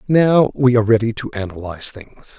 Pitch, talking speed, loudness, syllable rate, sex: 115 Hz, 175 wpm, -17 LUFS, 5.5 syllables/s, male